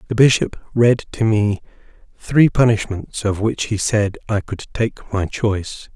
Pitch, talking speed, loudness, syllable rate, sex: 110 Hz, 160 wpm, -18 LUFS, 4.1 syllables/s, male